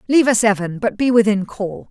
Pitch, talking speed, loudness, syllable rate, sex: 220 Hz, 220 wpm, -17 LUFS, 5.8 syllables/s, female